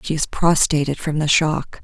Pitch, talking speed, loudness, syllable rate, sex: 155 Hz, 195 wpm, -18 LUFS, 4.7 syllables/s, female